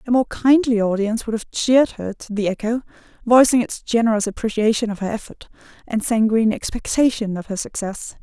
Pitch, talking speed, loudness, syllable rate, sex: 225 Hz, 175 wpm, -19 LUFS, 5.8 syllables/s, female